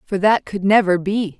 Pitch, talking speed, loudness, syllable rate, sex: 195 Hz, 215 wpm, -17 LUFS, 4.7 syllables/s, female